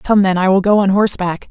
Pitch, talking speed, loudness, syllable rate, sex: 195 Hz, 280 wpm, -14 LUFS, 6.1 syllables/s, female